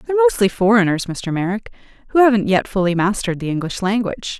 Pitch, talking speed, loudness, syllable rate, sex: 205 Hz, 180 wpm, -18 LUFS, 6.4 syllables/s, female